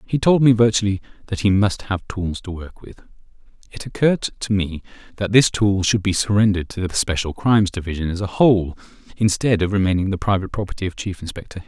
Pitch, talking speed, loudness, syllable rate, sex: 100 Hz, 205 wpm, -19 LUFS, 6.2 syllables/s, male